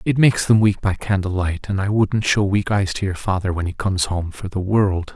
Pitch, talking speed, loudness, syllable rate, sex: 100 Hz, 270 wpm, -20 LUFS, 5.4 syllables/s, male